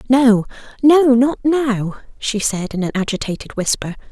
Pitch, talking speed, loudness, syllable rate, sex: 235 Hz, 145 wpm, -17 LUFS, 4.3 syllables/s, female